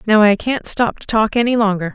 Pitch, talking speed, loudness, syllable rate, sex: 215 Hz, 245 wpm, -16 LUFS, 5.5 syllables/s, female